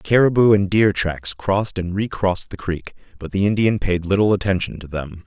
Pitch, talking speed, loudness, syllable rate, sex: 95 Hz, 195 wpm, -19 LUFS, 5.2 syllables/s, male